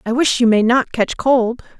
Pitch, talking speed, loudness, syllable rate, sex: 240 Hz, 235 wpm, -16 LUFS, 4.6 syllables/s, female